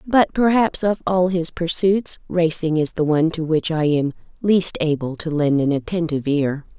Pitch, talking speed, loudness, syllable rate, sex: 165 Hz, 185 wpm, -20 LUFS, 4.7 syllables/s, female